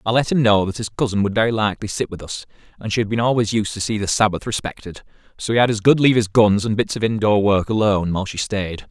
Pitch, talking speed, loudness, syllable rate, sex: 105 Hz, 275 wpm, -19 LUFS, 6.7 syllables/s, male